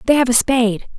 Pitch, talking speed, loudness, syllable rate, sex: 245 Hz, 245 wpm, -15 LUFS, 6.6 syllables/s, female